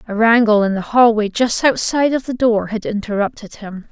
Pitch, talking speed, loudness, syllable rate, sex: 220 Hz, 200 wpm, -16 LUFS, 5.3 syllables/s, female